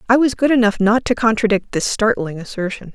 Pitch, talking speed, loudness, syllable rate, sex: 220 Hz, 205 wpm, -17 LUFS, 5.8 syllables/s, female